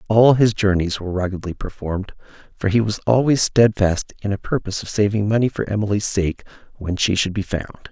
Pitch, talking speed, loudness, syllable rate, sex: 105 Hz, 190 wpm, -20 LUFS, 5.8 syllables/s, male